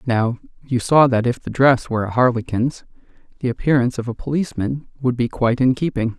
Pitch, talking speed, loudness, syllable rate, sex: 125 Hz, 195 wpm, -19 LUFS, 6.0 syllables/s, male